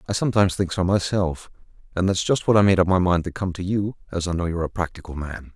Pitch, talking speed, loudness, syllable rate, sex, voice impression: 90 Hz, 270 wpm, -22 LUFS, 6.7 syllables/s, male, very masculine, very adult-like, middle-aged, very thick, slightly relaxed, powerful, slightly dark, slightly hard, clear, fluent, cool, very intellectual, very sincere, very calm, very mature, very friendly, very reassuring, unique, very elegant, wild, very sweet, kind, very modest